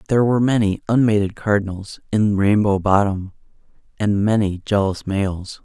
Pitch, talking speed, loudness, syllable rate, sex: 105 Hz, 130 wpm, -19 LUFS, 5.1 syllables/s, male